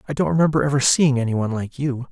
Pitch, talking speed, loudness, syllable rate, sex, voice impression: 130 Hz, 225 wpm, -19 LUFS, 6.8 syllables/s, male, very masculine, very adult-like, slightly old, very thick, slightly tensed, powerful, slightly bright, hard, slightly muffled, fluent, cool, intellectual, slightly refreshing, very sincere, calm, very mature, very friendly, very reassuring, unique, wild, sweet, very kind